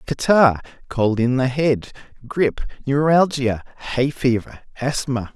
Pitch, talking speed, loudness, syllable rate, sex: 130 Hz, 110 wpm, -20 LUFS, 3.9 syllables/s, male